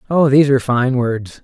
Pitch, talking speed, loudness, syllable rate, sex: 130 Hz, 210 wpm, -15 LUFS, 5.7 syllables/s, male